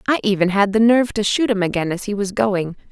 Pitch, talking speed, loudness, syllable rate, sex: 210 Hz, 265 wpm, -18 LUFS, 6.1 syllables/s, female